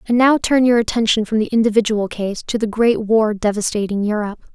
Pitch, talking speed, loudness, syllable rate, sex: 220 Hz, 200 wpm, -17 LUFS, 5.8 syllables/s, female